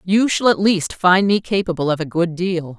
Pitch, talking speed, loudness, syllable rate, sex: 180 Hz, 235 wpm, -17 LUFS, 4.8 syllables/s, female